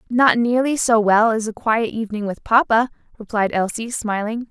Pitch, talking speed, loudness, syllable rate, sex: 225 Hz, 175 wpm, -19 LUFS, 5.0 syllables/s, female